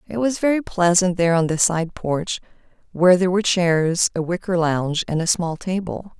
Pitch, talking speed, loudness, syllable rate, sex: 180 Hz, 195 wpm, -20 LUFS, 5.4 syllables/s, female